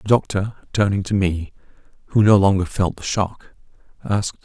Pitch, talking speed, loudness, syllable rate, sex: 100 Hz, 160 wpm, -20 LUFS, 5.1 syllables/s, male